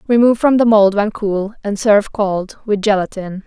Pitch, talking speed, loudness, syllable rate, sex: 210 Hz, 190 wpm, -15 LUFS, 5.4 syllables/s, female